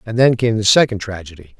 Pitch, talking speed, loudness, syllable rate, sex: 110 Hz, 225 wpm, -15 LUFS, 6.1 syllables/s, male